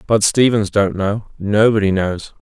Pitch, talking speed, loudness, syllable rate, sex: 105 Hz, 120 wpm, -16 LUFS, 4.2 syllables/s, male